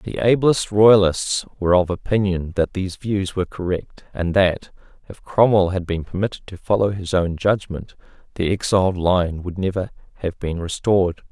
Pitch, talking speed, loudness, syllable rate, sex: 95 Hz, 165 wpm, -20 LUFS, 5.0 syllables/s, male